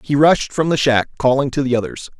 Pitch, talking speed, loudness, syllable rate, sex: 135 Hz, 245 wpm, -16 LUFS, 5.7 syllables/s, male